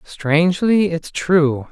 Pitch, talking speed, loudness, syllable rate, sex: 170 Hz, 105 wpm, -17 LUFS, 3.1 syllables/s, male